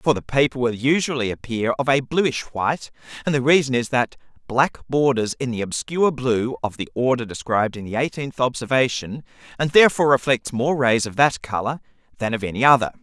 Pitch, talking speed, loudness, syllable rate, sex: 125 Hz, 190 wpm, -21 LUFS, 5.7 syllables/s, male